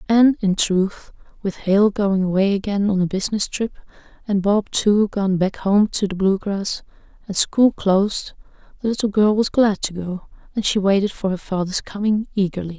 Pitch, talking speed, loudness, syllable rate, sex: 200 Hz, 185 wpm, -20 LUFS, 4.8 syllables/s, female